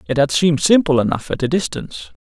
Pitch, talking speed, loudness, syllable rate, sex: 150 Hz, 215 wpm, -17 LUFS, 6.5 syllables/s, male